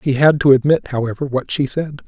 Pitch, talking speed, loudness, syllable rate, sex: 135 Hz, 230 wpm, -16 LUFS, 5.5 syllables/s, male